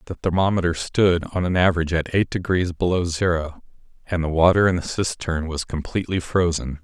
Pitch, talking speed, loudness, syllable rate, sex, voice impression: 85 Hz, 175 wpm, -21 LUFS, 5.7 syllables/s, male, masculine, adult-like, slightly thick, cool, intellectual, calm, slightly elegant